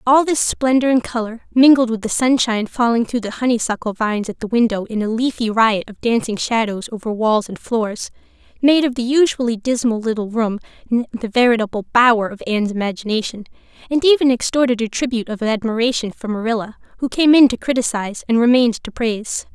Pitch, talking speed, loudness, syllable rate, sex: 230 Hz, 180 wpm, -18 LUFS, 5.9 syllables/s, female